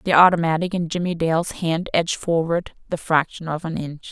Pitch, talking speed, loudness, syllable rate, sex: 165 Hz, 190 wpm, -21 LUFS, 5.5 syllables/s, female